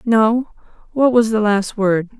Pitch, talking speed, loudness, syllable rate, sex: 220 Hz, 165 wpm, -16 LUFS, 3.9 syllables/s, female